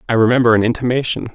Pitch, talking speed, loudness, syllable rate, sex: 120 Hz, 180 wpm, -15 LUFS, 8.0 syllables/s, male